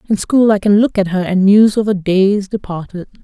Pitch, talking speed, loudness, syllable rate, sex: 200 Hz, 225 wpm, -13 LUFS, 5.1 syllables/s, female